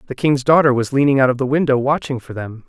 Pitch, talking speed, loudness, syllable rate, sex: 135 Hz, 270 wpm, -16 LUFS, 6.4 syllables/s, male